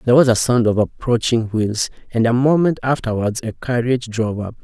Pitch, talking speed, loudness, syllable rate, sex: 120 Hz, 195 wpm, -18 LUFS, 5.8 syllables/s, male